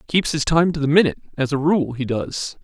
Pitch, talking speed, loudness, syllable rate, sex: 150 Hz, 250 wpm, -20 LUFS, 5.9 syllables/s, male